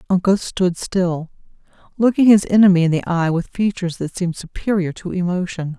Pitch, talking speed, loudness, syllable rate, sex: 180 Hz, 165 wpm, -18 LUFS, 5.5 syllables/s, female